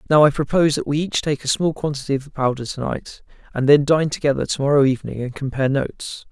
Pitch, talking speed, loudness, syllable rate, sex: 140 Hz, 240 wpm, -20 LUFS, 6.6 syllables/s, male